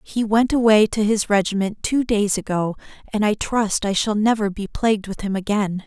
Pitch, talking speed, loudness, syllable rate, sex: 210 Hz, 205 wpm, -20 LUFS, 5.0 syllables/s, female